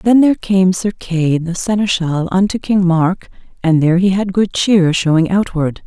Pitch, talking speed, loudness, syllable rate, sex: 185 Hz, 185 wpm, -14 LUFS, 4.6 syllables/s, female